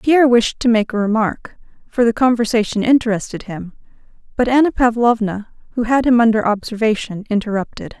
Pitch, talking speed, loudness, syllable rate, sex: 230 Hz, 150 wpm, -16 LUFS, 5.6 syllables/s, female